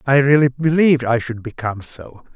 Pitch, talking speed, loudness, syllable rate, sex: 130 Hz, 180 wpm, -17 LUFS, 5.5 syllables/s, male